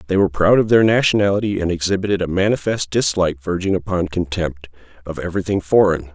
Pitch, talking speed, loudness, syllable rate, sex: 90 Hz, 165 wpm, -18 LUFS, 6.5 syllables/s, male